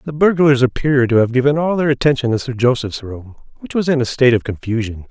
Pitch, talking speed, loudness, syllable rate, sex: 130 Hz, 235 wpm, -16 LUFS, 6.4 syllables/s, male